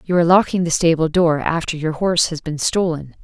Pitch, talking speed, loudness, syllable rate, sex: 165 Hz, 225 wpm, -17 LUFS, 5.8 syllables/s, female